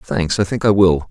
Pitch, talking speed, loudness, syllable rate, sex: 95 Hz, 270 wpm, -16 LUFS, 5.1 syllables/s, male